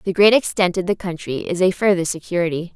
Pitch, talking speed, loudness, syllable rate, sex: 180 Hz, 220 wpm, -19 LUFS, 5.9 syllables/s, female